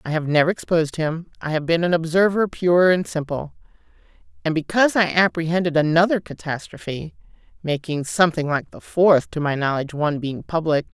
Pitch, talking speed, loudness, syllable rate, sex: 165 Hz, 160 wpm, -21 LUFS, 5.7 syllables/s, female